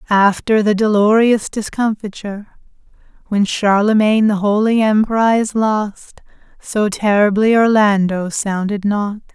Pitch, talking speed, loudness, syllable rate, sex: 210 Hz, 95 wpm, -15 LUFS, 4.2 syllables/s, female